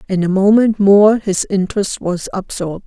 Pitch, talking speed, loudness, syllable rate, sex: 195 Hz, 165 wpm, -14 LUFS, 4.9 syllables/s, female